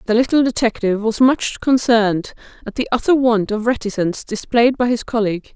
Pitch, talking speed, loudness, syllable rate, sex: 230 Hz, 175 wpm, -17 LUFS, 5.8 syllables/s, female